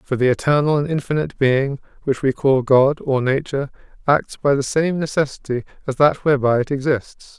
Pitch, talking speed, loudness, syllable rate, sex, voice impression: 140 Hz, 180 wpm, -19 LUFS, 5.4 syllables/s, male, very masculine, very middle-aged, very thick, tensed, slightly weak, slightly bright, soft, muffled, fluent, slightly raspy, cool, very intellectual, slightly refreshing, sincere, very calm, mature, very friendly, reassuring, unique, elegant, slightly wild, sweet, lively, kind, slightly modest